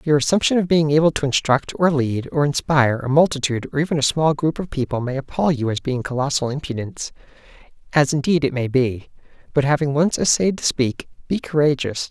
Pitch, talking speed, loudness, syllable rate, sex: 145 Hz, 195 wpm, -20 LUFS, 5.9 syllables/s, male